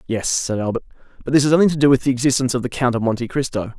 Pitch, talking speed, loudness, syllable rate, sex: 125 Hz, 285 wpm, -18 LUFS, 7.8 syllables/s, male